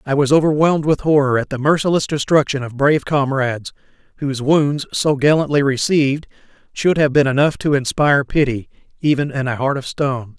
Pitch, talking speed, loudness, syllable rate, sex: 140 Hz, 175 wpm, -17 LUFS, 5.8 syllables/s, male